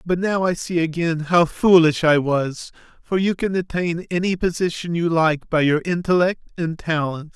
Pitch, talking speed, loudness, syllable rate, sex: 170 Hz, 180 wpm, -20 LUFS, 4.6 syllables/s, male